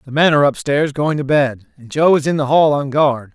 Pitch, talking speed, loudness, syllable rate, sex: 145 Hz, 270 wpm, -15 LUFS, 5.5 syllables/s, male